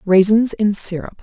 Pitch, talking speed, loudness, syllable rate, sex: 200 Hz, 145 wpm, -16 LUFS, 4.4 syllables/s, female